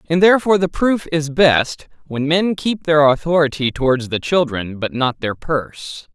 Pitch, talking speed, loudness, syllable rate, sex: 150 Hz, 175 wpm, -17 LUFS, 4.7 syllables/s, male